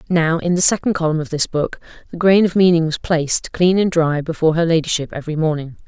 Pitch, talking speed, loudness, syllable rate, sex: 165 Hz, 225 wpm, -17 LUFS, 6.2 syllables/s, female